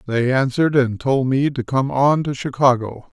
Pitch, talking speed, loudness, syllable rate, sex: 130 Hz, 190 wpm, -18 LUFS, 4.8 syllables/s, male